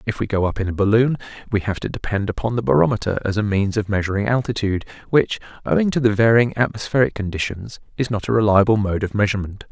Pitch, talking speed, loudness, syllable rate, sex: 105 Hz, 210 wpm, -20 LUFS, 6.7 syllables/s, male